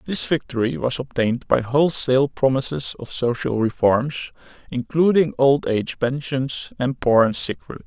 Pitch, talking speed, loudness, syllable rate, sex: 125 Hz, 145 wpm, -21 LUFS, 5.0 syllables/s, male